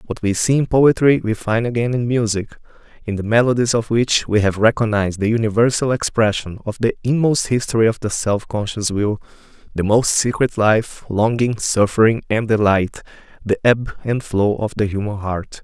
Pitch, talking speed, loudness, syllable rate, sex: 110 Hz, 175 wpm, -18 LUFS, 5.1 syllables/s, male